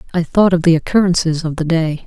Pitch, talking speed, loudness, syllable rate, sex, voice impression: 170 Hz, 230 wpm, -15 LUFS, 6.2 syllables/s, female, feminine, adult-like, slightly relaxed, weak, dark, slightly soft, fluent, intellectual, calm, elegant, sharp, modest